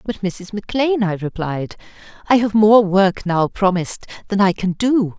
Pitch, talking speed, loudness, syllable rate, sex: 200 Hz, 175 wpm, -17 LUFS, 4.8 syllables/s, female